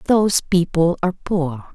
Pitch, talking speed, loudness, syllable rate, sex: 175 Hz, 135 wpm, -19 LUFS, 4.4 syllables/s, female